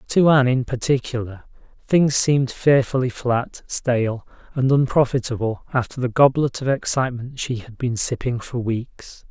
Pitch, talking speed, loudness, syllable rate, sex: 125 Hz, 140 wpm, -20 LUFS, 4.8 syllables/s, male